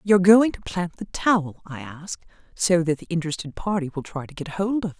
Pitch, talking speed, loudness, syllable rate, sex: 175 Hz, 240 wpm, -23 LUFS, 6.1 syllables/s, female